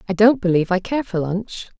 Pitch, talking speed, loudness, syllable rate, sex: 200 Hz, 235 wpm, -19 LUFS, 5.8 syllables/s, female